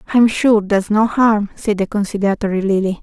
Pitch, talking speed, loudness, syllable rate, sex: 210 Hz, 180 wpm, -16 LUFS, 5.2 syllables/s, female